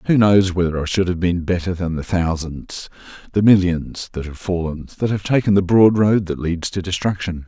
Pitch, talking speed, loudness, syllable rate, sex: 90 Hz, 210 wpm, -19 LUFS, 5.1 syllables/s, male